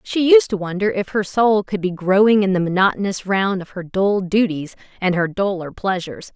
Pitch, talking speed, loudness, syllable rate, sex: 195 Hz, 210 wpm, -18 LUFS, 5.2 syllables/s, female